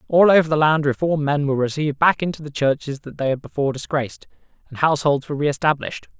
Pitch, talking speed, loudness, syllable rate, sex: 145 Hz, 205 wpm, -20 LUFS, 7.3 syllables/s, male